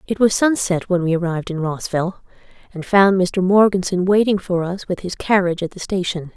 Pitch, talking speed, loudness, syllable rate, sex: 185 Hz, 200 wpm, -18 LUFS, 5.6 syllables/s, female